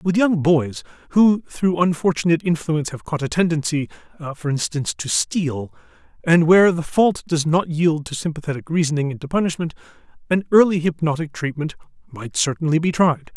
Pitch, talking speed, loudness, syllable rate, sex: 160 Hz, 160 wpm, -20 LUFS, 5.5 syllables/s, male